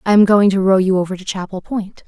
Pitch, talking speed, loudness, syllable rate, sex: 195 Hz, 290 wpm, -16 LUFS, 6.1 syllables/s, female